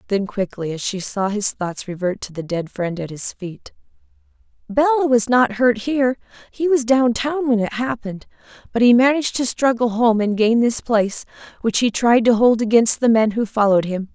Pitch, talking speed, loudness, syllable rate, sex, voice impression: 225 Hz, 205 wpm, -18 LUFS, 5.1 syllables/s, female, very feminine, slightly middle-aged, slightly thin, slightly tensed, slightly powerful, slightly dark, slightly hard, clear, fluent, cool, intellectual, slightly refreshing, sincere, very calm, slightly friendly, reassuring, unique, slightly elegant, slightly wild, slightly sweet, lively, strict, slightly intense, slightly light